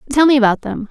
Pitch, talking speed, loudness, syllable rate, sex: 255 Hz, 265 wpm, -14 LUFS, 7.3 syllables/s, female